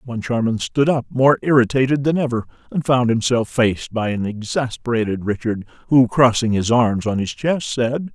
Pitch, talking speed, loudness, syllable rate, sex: 120 Hz, 170 wpm, -19 LUFS, 5.0 syllables/s, male